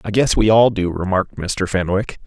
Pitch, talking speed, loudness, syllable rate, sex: 100 Hz, 210 wpm, -17 LUFS, 5.3 syllables/s, male